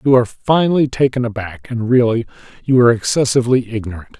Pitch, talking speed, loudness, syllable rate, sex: 120 Hz, 155 wpm, -16 LUFS, 6.5 syllables/s, male